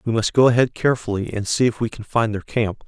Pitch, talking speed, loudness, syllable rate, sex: 115 Hz, 270 wpm, -20 LUFS, 6.1 syllables/s, male